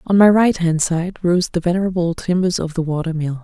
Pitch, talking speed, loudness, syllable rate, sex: 175 Hz, 225 wpm, -17 LUFS, 5.4 syllables/s, female